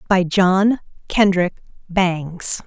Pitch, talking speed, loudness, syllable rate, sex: 185 Hz, 90 wpm, -18 LUFS, 2.5 syllables/s, female